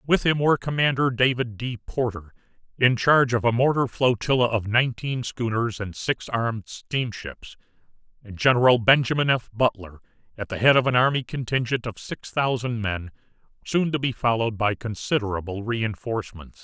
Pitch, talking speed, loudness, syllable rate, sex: 120 Hz, 155 wpm, -23 LUFS, 5.2 syllables/s, male